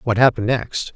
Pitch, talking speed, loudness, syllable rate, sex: 115 Hz, 190 wpm, -19 LUFS, 5.9 syllables/s, male